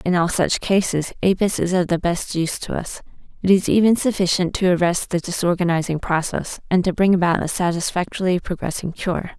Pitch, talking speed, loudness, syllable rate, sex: 180 Hz, 185 wpm, -20 LUFS, 5.6 syllables/s, female